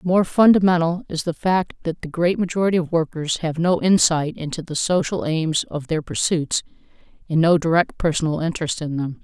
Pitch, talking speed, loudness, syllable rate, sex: 165 Hz, 180 wpm, -20 LUFS, 5.3 syllables/s, female